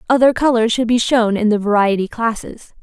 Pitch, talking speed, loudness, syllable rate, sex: 225 Hz, 190 wpm, -15 LUFS, 5.4 syllables/s, female